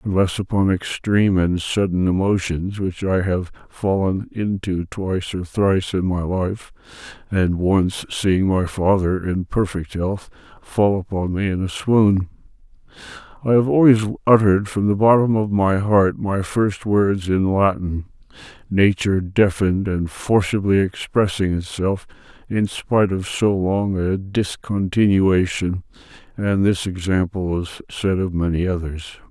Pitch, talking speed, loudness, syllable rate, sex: 95 Hz, 135 wpm, -20 LUFS, 4.2 syllables/s, male